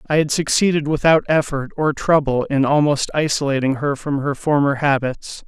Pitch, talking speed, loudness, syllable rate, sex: 145 Hz, 165 wpm, -18 LUFS, 5.1 syllables/s, male